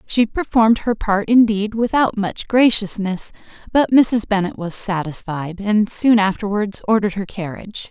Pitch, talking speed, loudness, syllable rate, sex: 210 Hz, 145 wpm, -18 LUFS, 4.6 syllables/s, female